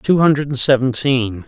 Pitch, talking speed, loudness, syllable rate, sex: 130 Hz, 120 wpm, -15 LUFS, 4.2 syllables/s, male